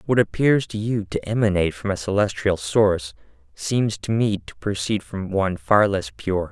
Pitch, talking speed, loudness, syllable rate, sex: 100 Hz, 185 wpm, -22 LUFS, 4.9 syllables/s, male